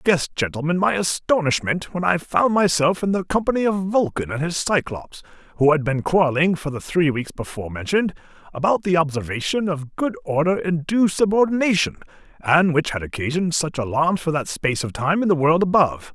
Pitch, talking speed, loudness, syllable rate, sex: 165 Hz, 185 wpm, -20 LUFS, 5.6 syllables/s, male